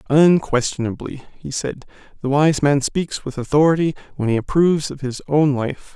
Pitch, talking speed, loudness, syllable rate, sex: 140 Hz, 160 wpm, -19 LUFS, 5.0 syllables/s, male